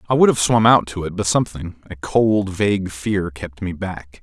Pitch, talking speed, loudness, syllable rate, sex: 95 Hz, 200 wpm, -19 LUFS, 4.8 syllables/s, male